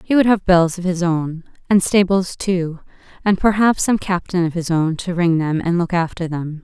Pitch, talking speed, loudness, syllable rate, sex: 175 Hz, 215 wpm, -18 LUFS, 4.8 syllables/s, female